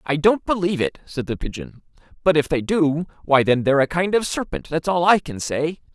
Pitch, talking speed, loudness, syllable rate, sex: 160 Hz, 230 wpm, -20 LUFS, 5.5 syllables/s, male